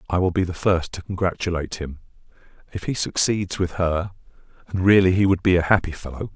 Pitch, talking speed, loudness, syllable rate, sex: 90 Hz, 200 wpm, -22 LUFS, 5.9 syllables/s, male